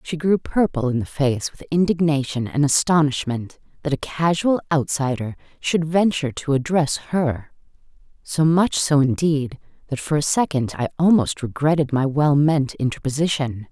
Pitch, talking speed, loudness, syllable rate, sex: 145 Hz, 150 wpm, -20 LUFS, 4.8 syllables/s, female